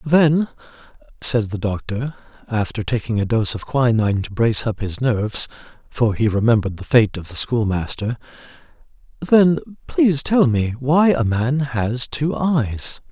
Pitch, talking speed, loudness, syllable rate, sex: 120 Hz, 150 wpm, -19 LUFS, 4.5 syllables/s, male